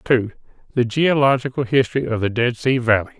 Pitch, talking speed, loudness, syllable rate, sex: 125 Hz, 170 wpm, -19 LUFS, 6.3 syllables/s, male